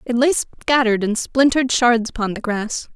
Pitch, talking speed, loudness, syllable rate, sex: 240 Hz, 180 wpm, -18 LUFS, 5.0 syllables/s, female